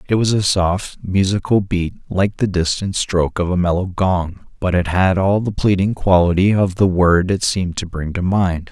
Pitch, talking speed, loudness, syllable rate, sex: 95 Hz, 205 wpm, -17 LUFS, 4.8 syllables/s, male